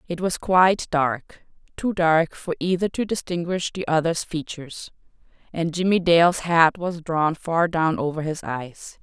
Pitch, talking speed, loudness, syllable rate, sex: 170 Hz, 155 wpm, -22 LUFS, 4.4 syllables/s, female